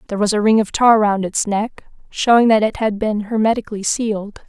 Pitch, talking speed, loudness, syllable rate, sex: 215 Hz, 215 wpm, -17 LUFS, 5.7 syllables/s, female